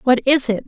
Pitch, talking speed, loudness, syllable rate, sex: 255 Hz, 270 wpm, -16 LUFS, 5.9 syllables/s, female